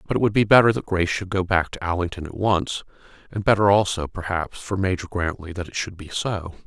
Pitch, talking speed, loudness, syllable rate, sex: 95 Hz, 235 wpm, -22 LUFS, 5.9 syllables/s, male